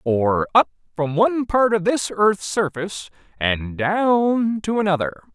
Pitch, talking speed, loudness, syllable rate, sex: 185 Hz, 145 wpm, -20 LUFS, 4.0 syllables/s, male